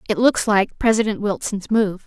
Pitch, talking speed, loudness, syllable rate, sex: 210 Hz, 175 wpm, -19 LUFS, 4.8 syllables/s, female